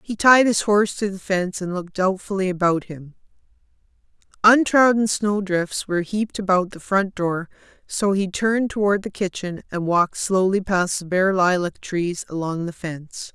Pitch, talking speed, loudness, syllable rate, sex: 190 Hz, 165 wpm, -21 LUFS, 5.0 syllables/s, female